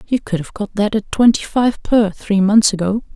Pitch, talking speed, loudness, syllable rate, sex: 210 Hz, 210 wpm, -16 LUFS, 4.8 syllables/s, female